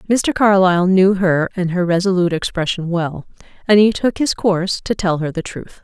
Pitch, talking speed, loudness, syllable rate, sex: 185 Hz, 195 wpm, -16 LUFS, 5.3 syllables/s, female